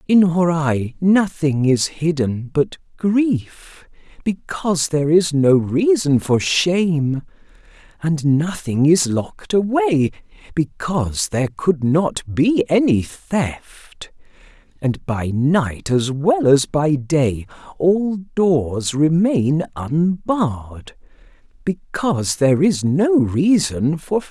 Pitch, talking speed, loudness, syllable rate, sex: 160 Hz, 105 wpm, -18 LUFS, 3.3 syllables/s, male